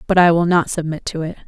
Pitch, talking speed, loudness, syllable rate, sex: 170 Hz, 285 wpm, -17 LUFS, 6.5 syllables/s, female